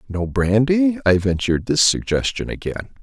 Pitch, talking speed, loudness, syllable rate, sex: 115 Hz, 140 wpm, -19 LUFS, 5.1 syllables/s, male